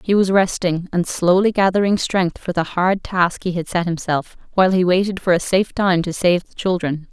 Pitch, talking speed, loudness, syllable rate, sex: 180 Hz, 220 wpm, -18 LUFS, 5.2 syllables/s, female